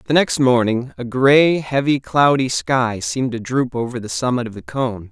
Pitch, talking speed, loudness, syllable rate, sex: 125 Hz, 200 wpm, -18 LUFS, 4.6 syllables/s, male